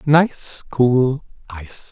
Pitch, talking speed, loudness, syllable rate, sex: 135 Hz, 95 wpm, -18 LUFS, 2.7 syllables/s, male